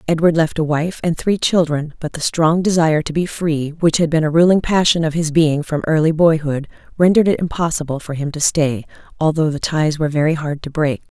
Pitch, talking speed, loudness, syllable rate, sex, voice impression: 160 Hz, 220 wpm, -17 LUFS, 5.7 syllables/s, female, feminine, adult-like, fluent, intellectual, slightly elegant